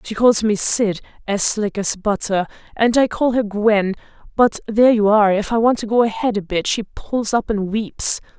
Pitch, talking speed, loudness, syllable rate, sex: 215 Hz, 205 wpm, -18 LUFS, 4.8 syllables/s, female